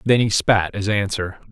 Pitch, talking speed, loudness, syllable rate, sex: 100 Hz, 200 wpm, -19 LUFS, 4.6 syllables/s, male